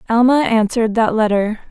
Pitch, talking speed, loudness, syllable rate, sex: 225 Hz, 140 wpm, -15 LUFS, 5.6 syllables/s, female